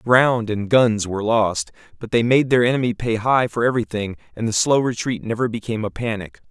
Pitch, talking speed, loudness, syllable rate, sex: 115 Hz, 205 wpm, -20 LUFS, 5.5 syllables/s, male